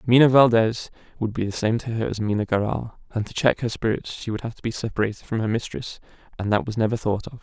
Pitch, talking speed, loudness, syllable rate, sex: 115 Hz, 250 wpm, -23 LUFS, 6.3 syllables/s, male